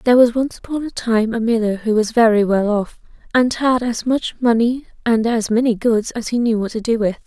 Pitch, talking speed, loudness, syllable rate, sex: 230 Hz, 240 wpm, -17 LUFS, 5.2 syllables/s, female